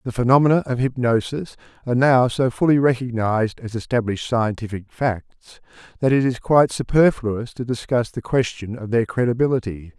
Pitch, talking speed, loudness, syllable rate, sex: 120 Hz, 150 wpm, -20 LUFS, 5.4 syllables/s, male